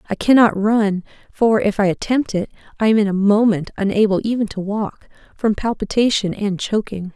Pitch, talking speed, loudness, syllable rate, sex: 210 Hz, 170 wpm, -18 LUFS, 5.1 syllables/s, female